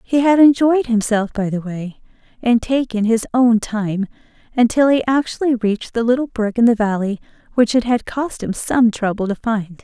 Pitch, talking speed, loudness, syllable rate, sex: 230 Hz, 190 wpm, -17 LUFS, 4.9 syllables/s, female